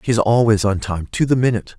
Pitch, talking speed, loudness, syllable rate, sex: 110 Hz, 235 wpm, -17 LUFS, 6.1 syllables/s, male